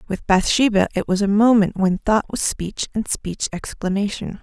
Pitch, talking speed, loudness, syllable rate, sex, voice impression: 200 Hz, 175 wpm, -20 LUFS, 4.8 syllables/s, female, feminine, adult-like, tensed, clear, fluent, intellectual, calm, slightly friendly, elegant, lively, slightly strict, slightly sharp